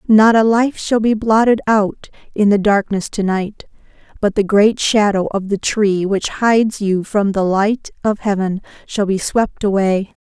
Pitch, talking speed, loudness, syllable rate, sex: 205 Hz, 175 wpm, -16 LUFS, 4.2 syllables/s, female